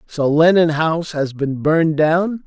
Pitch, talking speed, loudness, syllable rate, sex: 160 Hz, 170 wpm, -16 LUFS, 4.4 syllables/s, male